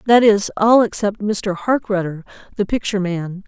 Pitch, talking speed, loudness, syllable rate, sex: 205 Hz, 155 wpm, -18 LUFS, 4.8 syllables/s, female